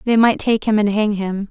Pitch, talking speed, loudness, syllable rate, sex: 215 Hz, 280 wpm, -17 LUFS, 5.0 syllables/s, female